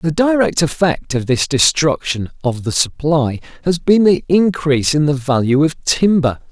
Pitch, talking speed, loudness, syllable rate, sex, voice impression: 155 Hz, 165 wpm, -15 LUFS, 4.5 syllables/s, male, masculine, middle-aged, tensed, powerful, bright, muffled, slightly raspy, mature, friendly, unique, wild, lively, strict, slightly intense